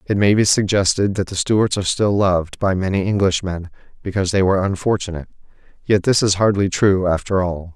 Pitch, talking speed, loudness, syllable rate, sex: 95 Hz, 185 wpm, -18 LUFS, 5.9 syllables/s, male